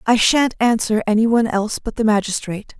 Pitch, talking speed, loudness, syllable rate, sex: 220 Hz, 195 wpm, -17 LUFS, 6.3 syllables/s, female